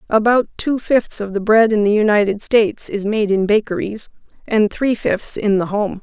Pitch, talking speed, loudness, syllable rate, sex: 210 Hz, 200 wpm, -17 LUFS, 4.8 syllables/s, female